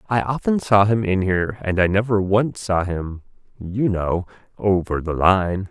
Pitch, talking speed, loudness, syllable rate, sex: 100 Hz, 170 wpm, -20 LUFS, 4.4 syllables/s, male